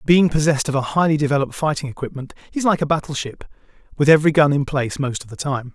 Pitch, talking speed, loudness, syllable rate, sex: 145 Hz, 230 wpm, -19 LUFS, 7.2 syllables/s, male